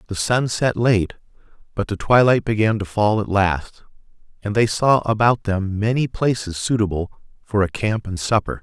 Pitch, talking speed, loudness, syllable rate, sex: 105 Hz, 175 wpm, -19 LUFS, 4.7 syllables/s, male